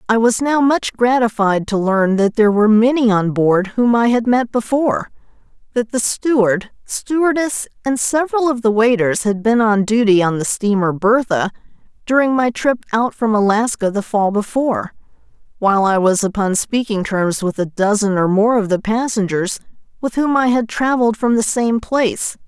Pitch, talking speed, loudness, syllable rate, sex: 225 Hz, 180 wpm, -16 LUFS, 4.9 syllables/s, female